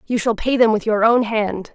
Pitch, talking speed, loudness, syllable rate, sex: 220 Hz, 275 wpm, -18 LUFS, 5.0 syllables/s, female